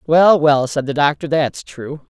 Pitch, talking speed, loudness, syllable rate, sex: 150 Hz, 195 wpm, -15 LUFS, 4.1 syllables/s, female